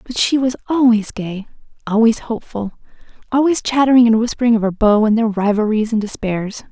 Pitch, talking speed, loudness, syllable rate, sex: 225 Hz, 170 wpm, -16 LUFS, 5.7 syllables/s, female